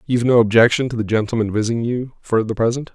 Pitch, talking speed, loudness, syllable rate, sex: 115 Hz, 225 wpm, -18 LUFS, 6.8 syllables/s, male